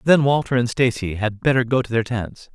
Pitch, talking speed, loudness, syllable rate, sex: 120 Hz, 235 wpm, -20 LUFS, 5.4 syllables/s, male